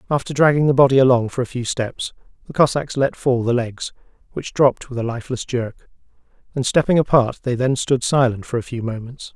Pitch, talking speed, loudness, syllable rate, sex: 125 Hz, 205 wpm, -19 LUFS, 5.7 syllables/s, male